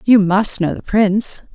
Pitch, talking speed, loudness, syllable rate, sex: 205 Hz, 195 wpm, -16 LUFS, 4.4 syllables/s, female